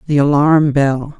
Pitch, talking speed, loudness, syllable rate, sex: 145 Hz, 150 wpm, -13 LUFS, 3.9 syllables/s, female